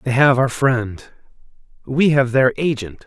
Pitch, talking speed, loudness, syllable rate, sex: 130 Hz, 155 wpm, -17 LUFS, 4.1 syllables/s, male